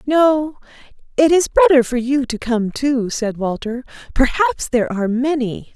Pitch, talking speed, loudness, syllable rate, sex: 265 Hz, 155 wpm, -17 LUFS, 4.7 syllables/s, female